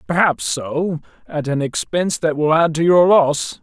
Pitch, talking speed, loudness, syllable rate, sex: 155 Hz, 180 wpm, -17 LUFS, 4.4 syllables/s, male